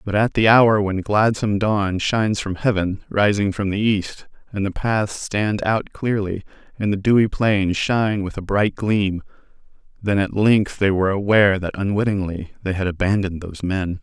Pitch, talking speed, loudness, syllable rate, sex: 100 Hz, 180 wpm, -20 LUFS, 4.9 syllables/s, male